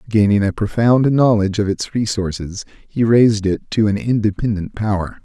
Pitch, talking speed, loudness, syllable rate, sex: 105 Hz, 160 wpm, -17 LUFS, 5.2 syllables/s, male